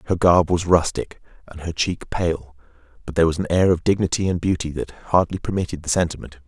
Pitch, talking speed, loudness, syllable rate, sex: 85 Hz, 220 wpm, -21 LUFS, 6.4 syllables/s, male